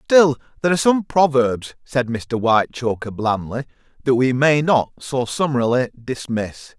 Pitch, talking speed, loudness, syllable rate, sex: 130 Hz, 140 wpm, -19 LUFS, 4.6 syllables/s, male